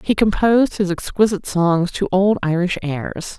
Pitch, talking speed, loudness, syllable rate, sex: 190 Hz, 160 wpm, -18 LUFS, 4.7 syllables/s, female